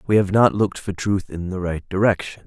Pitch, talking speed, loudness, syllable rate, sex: 95 Hz, 245 wpm, -21 LUFS, 5.6 syllables/s, male